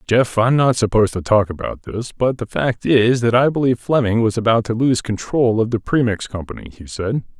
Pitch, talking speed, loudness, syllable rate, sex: 115 Hz, 220 wpm, -18 LUFS, 5.4 syllables/s, male